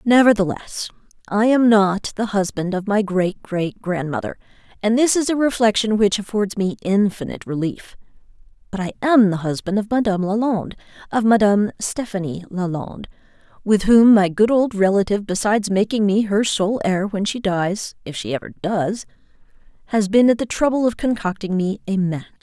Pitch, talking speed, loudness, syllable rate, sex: 205 Hz, 155 wpm, -19 LUFS, 5.3 syllables/s, female